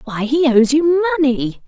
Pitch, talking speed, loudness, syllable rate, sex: 280 Hz, 180 wpm, -15 LUFS, 4.4 syllables/s, female